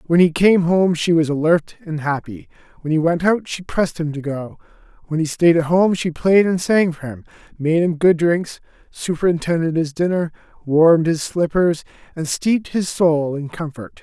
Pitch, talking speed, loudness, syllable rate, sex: 165 Hz, 190 wpm, -18 LUFS, 4.9 syllables/s, male